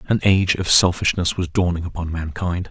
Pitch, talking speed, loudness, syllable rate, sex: 90 Hz, 180 wpm, -19 LUFS, 5.5 syllables/s, male